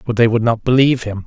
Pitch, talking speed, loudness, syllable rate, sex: 115 Hz, 285 wpm, -15 LUFS, 7.1 syllables/s, male